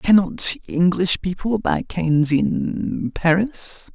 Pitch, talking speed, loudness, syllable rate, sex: 165 Hz, 105 wpm, -20 LUFS, 3.2 syllables/s, male